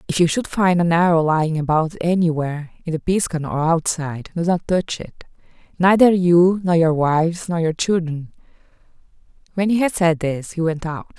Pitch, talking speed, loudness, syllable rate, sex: 170 Hz, 180 wpm, -19 LUFS, 5.1 syllables/s, female